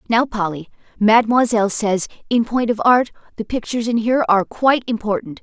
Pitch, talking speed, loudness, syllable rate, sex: 225 Hz, 165 wpm, -18 LUFS, 6.2 syllables/s, female